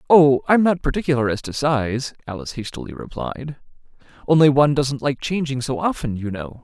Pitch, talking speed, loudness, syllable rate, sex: 135 Hz, 170 wpm, -20 LUFS, 5.6 syllables/s, male